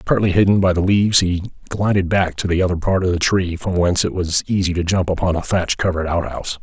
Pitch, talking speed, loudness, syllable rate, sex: 90 Hz, 255 wpm, -18 LUFS, 6.3 syllables/s, male